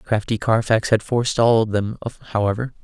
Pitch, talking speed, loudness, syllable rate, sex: 110 Hz, 125 wpm, -20 LUFS, 5.5 syllables/s, male